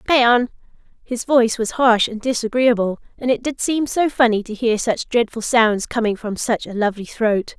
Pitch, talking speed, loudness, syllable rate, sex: 230 Hz, 190 wpm, -19 LUFS, 4.9 syllables/s, female